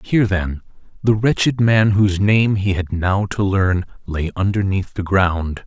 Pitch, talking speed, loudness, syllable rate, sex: 100 Hz, 170 wpm, -18 LUFS, 4.3 syllables/s, male